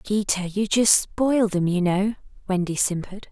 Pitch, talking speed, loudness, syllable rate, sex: 195 Hz, 165 wpm, -22 LUFS, 4.6 syllables/s, female